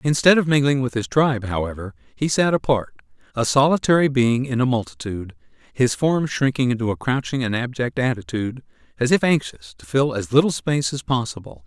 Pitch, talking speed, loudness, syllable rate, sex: 125 Hz, 180 wpm, -20 LUFS, 5.7 syllables/s, male